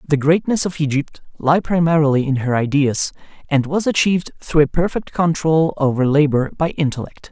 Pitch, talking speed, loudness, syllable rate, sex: 155 Hz, 165 wpm, -18 LUFS, 5.2 syllables/s, male